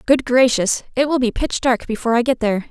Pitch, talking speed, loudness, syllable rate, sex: 245 Hz, 245 wpm, -18 LUFS, 6.2 syllables/s, female